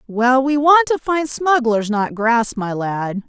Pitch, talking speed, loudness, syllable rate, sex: 250 Hz, 185 wpm, -17 LUFS, 3.6 syllables/s, female